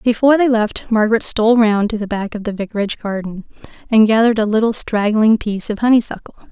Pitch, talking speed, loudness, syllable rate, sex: 220 Hz, 195 wpm, -15 LUFS, 6.3 syllables/s, female